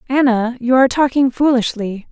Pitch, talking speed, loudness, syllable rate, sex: 250 Hz, 140 wpm, -15 LUFS, 5.3 syllables/s, female